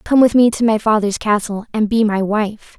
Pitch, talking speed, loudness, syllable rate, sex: 215 Hz, 235 wpm, -16 LUFS, 5.0 syllables/s, female